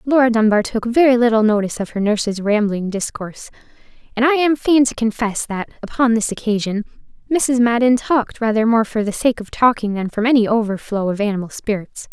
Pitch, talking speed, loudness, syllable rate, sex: 225 Hz, 190 wpm, -17 LUFS, 5.8 syllables/s, female